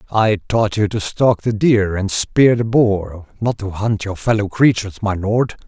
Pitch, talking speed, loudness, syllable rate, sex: 105 Hz, 200 wpm, -17 LUFS, 4.3 syllables/s, male